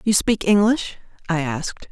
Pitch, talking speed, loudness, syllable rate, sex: 190 Hz, 155 wpm, -20 LUFS, 4.6 syllables/s, female